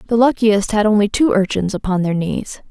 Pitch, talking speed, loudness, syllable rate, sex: 205 Hz, 200 wpm, -16 LUFS, 5.3 syllables/s, female